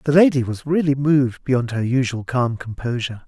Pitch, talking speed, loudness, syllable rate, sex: 130 Hz, 185 wpm, -20 LUFS, 5.5 syllables/s, male